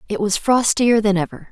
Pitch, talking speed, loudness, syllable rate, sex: 215 Hz, 195 wpm, -17 LUFS, 5.3 syllables/s, female